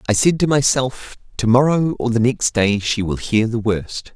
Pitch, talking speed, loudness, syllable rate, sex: 120 Hz, 215 wpm, -18 LUFS, 4.5 syllables/s, male